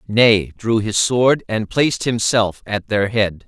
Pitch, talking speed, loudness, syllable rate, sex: 110 Hz, 175 wpm, -17 LUFS, 3.8 syllables/s, male